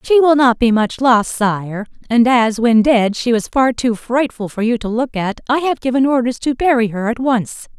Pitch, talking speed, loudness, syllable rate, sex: 240 Hz, 230 wpm, -15 LUFS, 4.7 syllables/s, female